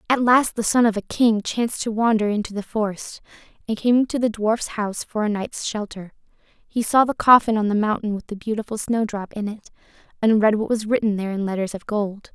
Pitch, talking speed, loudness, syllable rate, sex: 215 Hz, 225 wpm, -21 LUFS, 5.6 syllables/s, female